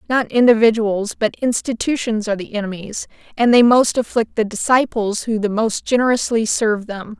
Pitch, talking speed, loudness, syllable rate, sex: 225 Hz, 160 wpm, -17 LUFS, 5.2 syllables/s, female